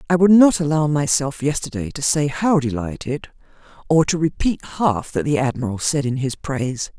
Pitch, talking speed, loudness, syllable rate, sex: 145 Hz, 180 wpm, -19 LUFS, 5.0 syllables/s, female